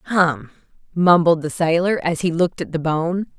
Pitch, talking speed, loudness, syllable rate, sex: 170 Hz, 175 wpm, -19 LUFS, 4.6 syllables/s, female